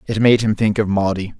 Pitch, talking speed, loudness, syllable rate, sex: 105 Hz, 260 wpm, -17 LUFS, 5.7 syllables/s, male